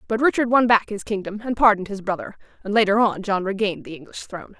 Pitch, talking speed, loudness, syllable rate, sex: 205 Hz, 235 wpm, -21 LUFS, 6.8 syllables/s, female